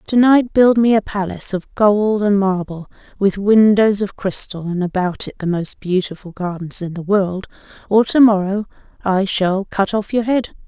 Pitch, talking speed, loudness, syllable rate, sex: 200 Hz, 180 wpm, -17 LUFS, 4.7 syllables/s, female